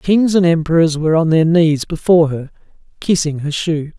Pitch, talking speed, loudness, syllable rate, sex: 160 Hz, 180 wpm, -14 LUFS, 5.2 syllables/s, male